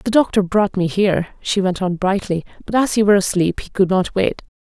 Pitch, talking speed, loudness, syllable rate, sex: 195 Hz, 235 wpm, -18 LUFS, 5.7 syllables/s, female